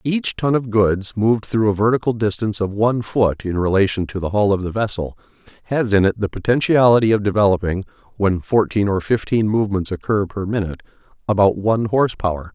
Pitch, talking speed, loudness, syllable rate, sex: 105 Hz, 185 wpm, -18 LUFS, 6.0 syllables/s, male